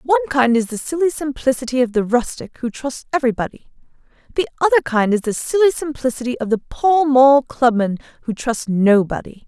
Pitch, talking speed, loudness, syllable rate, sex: 260 Hz, 170 wpm, -18 LUFS, 5.7 syllables/s, female